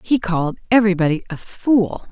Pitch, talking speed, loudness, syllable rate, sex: 195 Hz, 140 wpm, -18 LUFS, 5.5 syllables/s, female